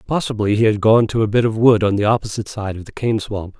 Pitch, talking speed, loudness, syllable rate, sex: 105 Hz, 285 wpm, -17 LUFS, 6.4 syllables/s, male